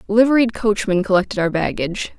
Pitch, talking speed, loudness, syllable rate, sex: 210 Hz, 135 wpm, -18 LUFS, 6.0 syllables/s, female